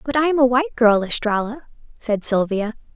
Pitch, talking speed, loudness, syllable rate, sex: 235 Hz, 185 wpm, -19 LUFS, 5.7 syllables/s, female